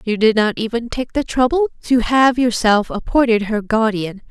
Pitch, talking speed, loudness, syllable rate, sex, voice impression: 230 Hz, 180 wpm, -17 LUFS, 4.7 syllables/s, female, feminine, adult-like, tensed, powerful, slightly bright, clear, halting, friendly, unique, lively, intense, slightly sharp